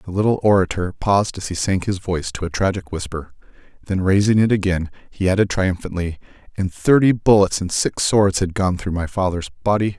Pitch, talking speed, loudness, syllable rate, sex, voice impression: 95 Hz, 190 wpm, -19 LUFS, 5.6 syllables/s, male, very masculine, very adult-like, cool, slightly intellectual, calm, slightly mature, slightly wild